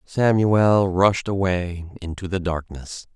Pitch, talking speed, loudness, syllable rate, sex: 95 Hz, 115 wpm, -20 LUFS, 3.5 syllables/s, male